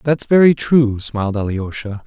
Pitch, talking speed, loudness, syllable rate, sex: 120 Hz, 145 wpm, -16 LUFS, 4.6 syllables/s, male